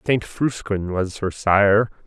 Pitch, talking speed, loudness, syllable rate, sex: 100 Hz, 145 wpm, -20 LUFS, 3.3 syllables/s, male